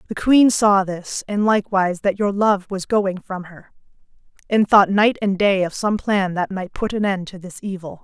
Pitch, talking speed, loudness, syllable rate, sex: 195 Hz, 215 wpm, -19 LUFS, 4.7 syllables/s, female